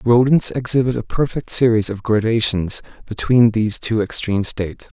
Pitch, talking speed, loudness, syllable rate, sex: 115 Hz, 155 wpm, -18 LUFS, 5.4 syllables/s, male